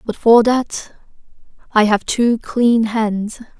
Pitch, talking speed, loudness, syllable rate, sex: 225 Hz, 135 wpm, -16 LUFS, 2.9 syllables/s, female